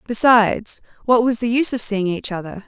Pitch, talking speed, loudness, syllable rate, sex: 225 Hz, 200 wpm, -18 LUFS, 5.7 syllables/s, female